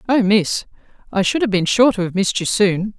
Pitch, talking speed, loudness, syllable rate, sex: 205 Hz, 240 wpm, -17 LUFS, 5.5 syllables/s, female